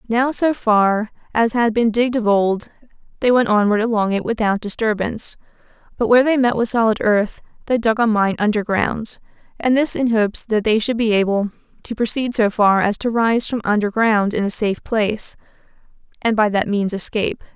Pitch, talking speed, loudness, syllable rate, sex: 220 Hz, 195 wpm, -18 LUFS, 5.3 syllables/s, female